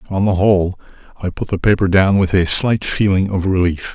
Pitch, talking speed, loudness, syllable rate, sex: 95 Hz, 215 wpm, -16 LUFS, 5.4 syllables/s, male